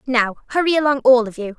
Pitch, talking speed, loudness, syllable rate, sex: 255 Hz, 230 wpm, -17 LUFS, 6.5 syllables/s, female